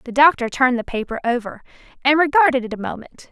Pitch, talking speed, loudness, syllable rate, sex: 260 Hz, 200 wpm, -18 LUFS, 6.6 syllables/s, female